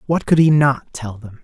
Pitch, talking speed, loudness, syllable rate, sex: 135 Hz, 250 wpm, -15 LUFS, 4.7 syllables/s, male